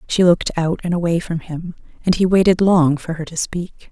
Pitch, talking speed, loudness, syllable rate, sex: 170 Hz, 230 wpm, -18 LUFS, 5.3 syllables/s, female